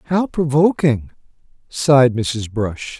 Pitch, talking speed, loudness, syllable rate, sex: 135 Hz, 100 wpm, -17 LUFS, 3.6 syllables/s, male